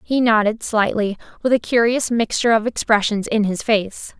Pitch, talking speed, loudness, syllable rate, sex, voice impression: 220 Hz, 170 wpm, -18 LUFS, 5.0 syllables/s, female, feminine, slightly adult-like, slightly clear, sincere, slightly lively